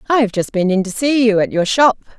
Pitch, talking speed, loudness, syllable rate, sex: 225 Hz, 275 wpm, -15 LUFS, 6.1 syllables/s, female